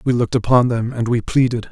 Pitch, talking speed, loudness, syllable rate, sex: 120 Hz, 245 wpm, -17 LUFS, 6.2 syllables/s, male